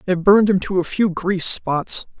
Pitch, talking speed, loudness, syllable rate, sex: 185 Hz, 220 wpm, -17 LUFS, 5.1 syllables/s, female